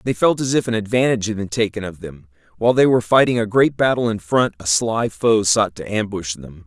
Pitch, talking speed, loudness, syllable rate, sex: 105 Hz, 245 wpm, -18 LUFS, 5.8 syllables/s, male